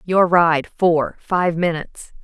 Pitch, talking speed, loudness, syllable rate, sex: 170 Hz, 135 wpm, -18 LUFS, 3.5 syllables/s, female